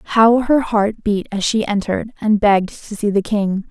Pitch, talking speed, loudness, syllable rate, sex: 210 Hz, 210 wpm, -17 LUFS, 4.5 syllables/s, female